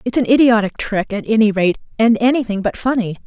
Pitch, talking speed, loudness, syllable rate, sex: 225 Hz, 200 wpm, -16 LUFS, 5.9 syllables/s, female